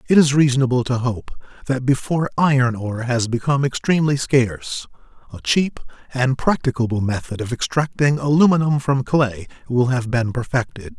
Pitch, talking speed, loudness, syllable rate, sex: 130 Hz, 145 wpm, -19 LUFS, 5.4 syllables/s, male